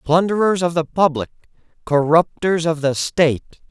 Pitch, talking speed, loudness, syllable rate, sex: 160 Hz, 130 wpm, -18 LUFS, 5.0 syllables/s, male